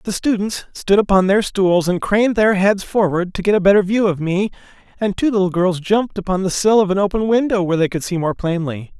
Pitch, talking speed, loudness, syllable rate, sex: 195 Hz, 245 wpm, -17 LUFS, 5.8 syllables/s, male